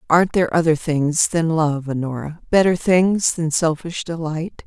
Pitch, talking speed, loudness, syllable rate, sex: 160 Hz, 140 wpm, -19 LUFS, 4.6 syllables/s, female